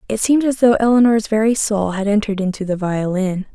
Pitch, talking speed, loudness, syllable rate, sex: 210 Hz, 205 wpm, -17 LUFS, 6.0 syllables/s, female